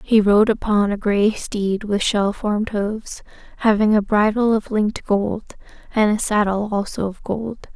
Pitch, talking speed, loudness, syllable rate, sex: 210 Hz, 170 wpm, -19 LUFS, 4.4 syllables/s, female